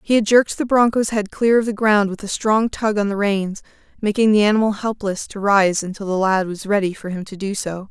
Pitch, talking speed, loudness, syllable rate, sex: 205 Hz, 250 wpm, -19 LUFS, 5.5 syllables/s, female